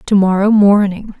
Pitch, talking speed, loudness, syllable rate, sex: 200 Hz, 150 wpm, -12 LUFS, 4.6 syllables/s, female